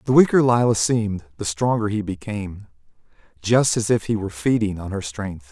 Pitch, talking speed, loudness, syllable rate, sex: 105 Hz, 185 wpm, -21 LUFS, 5.5 syllables/s, male